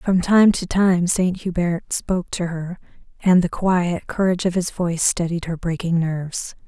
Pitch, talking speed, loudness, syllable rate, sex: 175 Hz, 180 wpm, -20 LUFS, 4.6 syllables/s, female